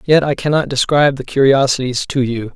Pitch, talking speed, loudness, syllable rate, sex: 135 Hz, 190 wpm, -15 LUFS, 5.7 syllables/s, male